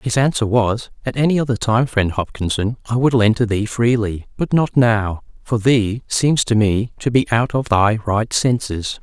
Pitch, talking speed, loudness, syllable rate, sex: 115 Hz, 200 wpm, -18 LUFS, 4.4 syllables/s, male